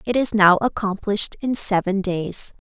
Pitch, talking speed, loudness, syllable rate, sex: 205 Hz, 155 wpm, -19 LUFS, 4.7 syllables/s, female